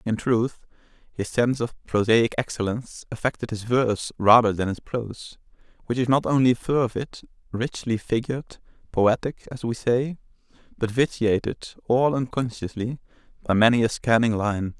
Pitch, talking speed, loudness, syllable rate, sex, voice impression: 120 Hz, 140 wpm, -23 LUFS, 4.8 syllables/s, male, very masculine, very adult-like, middle-aged, very thick, slightly relaxed, slightly weak, slightly bright, soft, clear, fluent, cool, very intellectual, refreshing, sincere, calm, slightly mature, friendly, reassuring, slightly unique, elegant, sweet, slightly lively, kind, slightly modest, slightly light